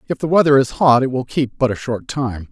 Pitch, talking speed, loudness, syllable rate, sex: 130 Hz, 285 wpm, -17 LUFS, 5.7 syllables/s, male